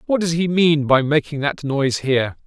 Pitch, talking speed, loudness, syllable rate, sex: 150 Hz, 220 wpm, -18 LUFS, 5.3 syllables/s, male